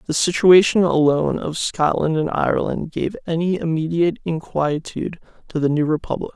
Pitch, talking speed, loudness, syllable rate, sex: 160 Hz, 140 wpm, -19 LUFS, 5.4 syllables/s, male